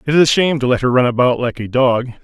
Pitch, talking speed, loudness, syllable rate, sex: 130 Hz, 320 wpm, -15 LUFS, 7.0 syllables/s, male